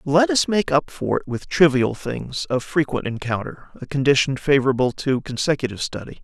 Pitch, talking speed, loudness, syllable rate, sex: 135 Hz, 175 wpm, -21 LUFS, 5.3 syllables/s, male